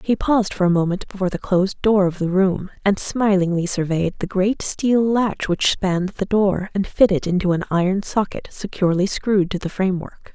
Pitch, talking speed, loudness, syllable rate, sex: 190 Hz, 195 wpm, -20 LUFS, 5.3 syllables/s, female